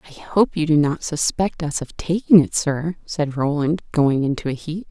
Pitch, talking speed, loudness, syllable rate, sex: 155 Hz, 210 wpm, -20 LUFS, 4.6 syllables/s, female